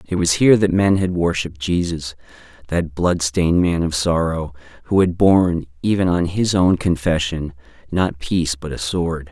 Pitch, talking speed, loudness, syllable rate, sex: 85 Hz, 175 wpm, -18 LUFS, 4.9 syllables/s, male